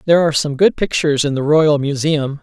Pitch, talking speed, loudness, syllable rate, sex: 150 Hz, 225 wpm, -15 LUFS, 6.1 syllables/s, male